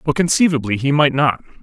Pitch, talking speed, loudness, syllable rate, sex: 145 Hz, 185 wpm, -16 LUFS, 5.9 syllables/s, male